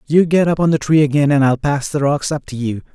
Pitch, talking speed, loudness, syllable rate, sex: 145 Hz, 305 wpm, -16 LUFS, 5.9 syllables/s, male